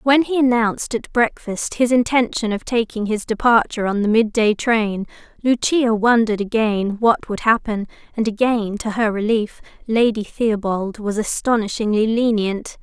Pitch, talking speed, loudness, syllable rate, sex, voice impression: 225 Hz, 145 wpm, -19 LUFS, 4.7 syllables/s, female, very feminine, young, thin, very tensed, slightly powerful, very bright, slightly hard, very clear, fluent, very cute, intellectual, refreshing, slightly sincere, calm, very friendly, very reassuring, slightly unique, elegant, slightly wild, sweet, lively, kind, slightly sharp, modest, light